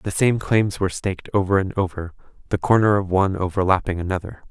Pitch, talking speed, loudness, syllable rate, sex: 95 Hz, 185 wpm, -21 LUFS, 6.2 syllables/s, male